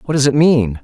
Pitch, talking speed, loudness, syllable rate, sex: 135 Hz, 285 wpm, -13 LUFS, 5.1 syllables/s, male